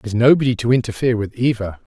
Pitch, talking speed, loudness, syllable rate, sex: 115 Hz, 210 wpm, -18 LUFS, 7.7 syllables/s, male